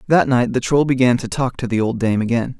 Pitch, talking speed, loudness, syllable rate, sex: 125 Hz, 280 wpm, -18 LUFS, 5.7 syllables/s, male